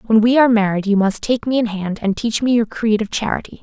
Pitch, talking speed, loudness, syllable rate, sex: 220 Hz, 280 wpm, -17 LUFS, 6.1 syllables/s, female